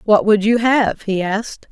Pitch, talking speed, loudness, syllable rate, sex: 210 Hz, 210 wpm, -16 LUFS, 4.4 syllables/s, female